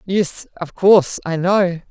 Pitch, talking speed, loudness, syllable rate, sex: 180 Hz, 155 wpm, -16 LUFS, 4.0 syllables/s, female